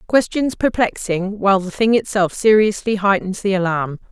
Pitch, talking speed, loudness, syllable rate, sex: 200 Hz, 145 wpm, -17 LUFS, 4.9 syllables/s, female